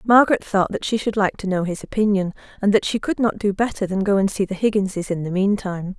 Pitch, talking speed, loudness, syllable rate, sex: 200 Hz, 260 wpm, -21 LUFS, 6.2 syllables/s, female